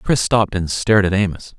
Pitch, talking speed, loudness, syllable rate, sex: 100 Hz, 225 wpm, -17 LUFS, 5.8 syllables/s, male